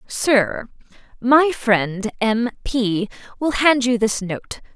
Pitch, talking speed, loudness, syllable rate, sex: 230 Hz, 115 wpm, -19 LUFS, 2.8 syllables/s, female